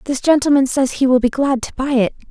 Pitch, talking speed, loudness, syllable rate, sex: 265 Hz, 260 wpm, -16 LUFS, 6.1 syllables/s, female